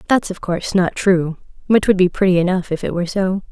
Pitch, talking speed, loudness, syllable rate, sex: 185 Hz, 240 wpm, -17 LUFS, 6.0 syllables/s, female